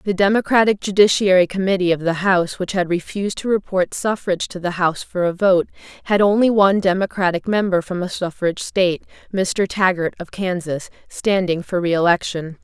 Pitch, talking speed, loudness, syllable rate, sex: 185 Hz, 165 wpm, -19 LUFS, 5.5 syllables/s, female